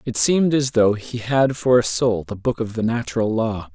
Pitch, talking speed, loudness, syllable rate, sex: 115 Hz, 240 wpm, -20 LUFS, 5.0 syllables/s, male